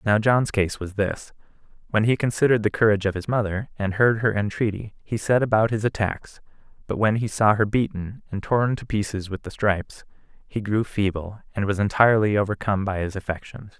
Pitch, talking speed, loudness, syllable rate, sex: 105 Hz, 195 wpm, -23 LUFS, 5.6 syllables/s, male